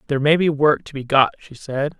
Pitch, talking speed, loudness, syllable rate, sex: 140 Hz, 270 wpm, -19 LUFS, 5.8 syllables/s, male